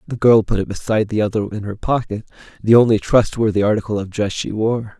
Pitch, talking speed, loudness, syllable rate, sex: 105 Hz, 215 wpm, -18 LUFS, 6.1 syllables/s, male